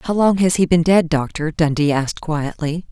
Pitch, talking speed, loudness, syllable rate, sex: 165 Hz, 205 wpm, -18 LUFS, 4.9 syllables/s, female